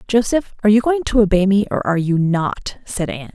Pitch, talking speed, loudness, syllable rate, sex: 205 Hz, 235 wpm, -17 LUFS, 6.1 syllables/s, female